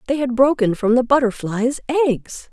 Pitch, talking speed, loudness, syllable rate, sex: 250 Hz, 165 wpm, -18 LUFS, 4.9 syllables/s, female